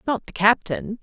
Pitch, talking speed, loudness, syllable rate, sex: 220 Hz, 175 wpm, -21 LUFS, 4.5 syllables/s, female